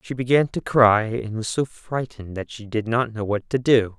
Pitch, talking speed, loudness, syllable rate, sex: 115 Hz, 240 wpm, -22 LUFS, 4.9 syllables/s, male